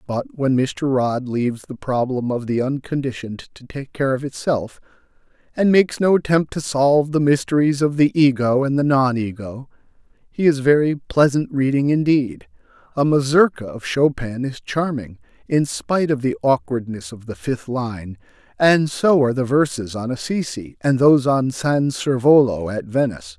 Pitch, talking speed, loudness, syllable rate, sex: 130 Hz, 165 wpm, -19 LUFS, 4.8 syllables/s, male